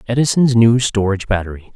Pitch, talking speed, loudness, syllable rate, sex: 110 Hz, 135 wpm, -15 LUFS, 6.3 syllables/s, male